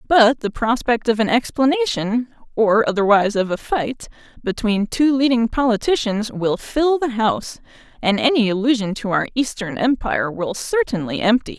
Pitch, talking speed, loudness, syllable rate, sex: 230 Hz, 145 wpm, -19 LUFS, 5.0 syllables/s, female